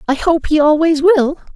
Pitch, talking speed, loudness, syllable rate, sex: 310 Hz, 195 wpm, -13 LUFS, 4.8 syllables/s, female